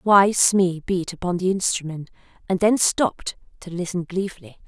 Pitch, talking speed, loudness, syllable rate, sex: 180 Hz, 155 wpm, -21 LUFS, 5.1 syllables/s, female